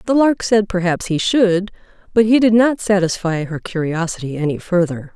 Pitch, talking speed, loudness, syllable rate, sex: 190 Hz, 175 wpm, -17 LUFS, 5.0 syllables/s, female